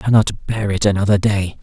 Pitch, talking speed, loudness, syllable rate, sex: 100 Hz, 220 wpm, -17 LUFS, 5.7 syllables/s, male